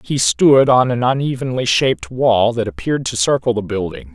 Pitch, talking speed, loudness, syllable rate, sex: 120 Hz, 190 wpm, -16 LUFS, 5.2 syllables/s, male